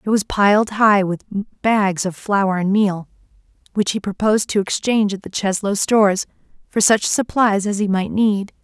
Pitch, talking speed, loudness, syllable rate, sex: 205 Hz, 180 wpm, -18 LUFS, 4.6 syllables/s, female